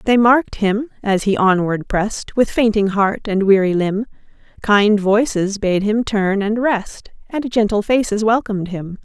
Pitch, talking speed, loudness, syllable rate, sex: 210 Hz, 165 wpm, -17 LUFS, 4.1 syllables/s, female